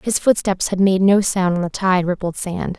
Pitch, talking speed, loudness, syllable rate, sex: 190 Hz, 235 wpm, -18 LUFS, 4.8 syllables/s, female